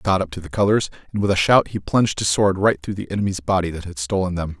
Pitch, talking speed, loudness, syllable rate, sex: 95 Hz, 300 wpm, -20 LUFS, 6.8 syllables/s, male